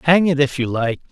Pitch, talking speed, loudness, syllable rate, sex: 145 Hz, 270 wpm, -18 LUFS, 5.8 syllables/s, male